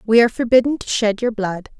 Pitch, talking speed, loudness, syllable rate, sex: 225 Hz, 235 wpm, -18 LUFS, 6.3 syllables/s, female